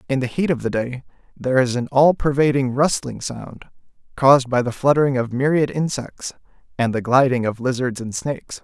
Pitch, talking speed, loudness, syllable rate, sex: 130 Hz, 190 wpm, -19 LUFS, 5.4 syllables/s, male